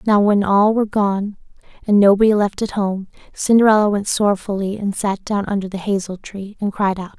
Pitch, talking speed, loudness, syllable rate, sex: 200 Hz, 190 wpm, -17 LUFS, 5.4 syllables/s, female